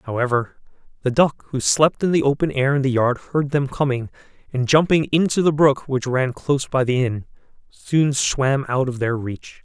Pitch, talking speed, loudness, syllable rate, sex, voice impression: 135 Hz, 200 wpm, -20 LUFS, 4.8 syllables/s, male, adult-like, tensed, powerful, slightly hard, clear, cool, slightly friendly, unique, wild, lively, slightly strict, slightly intense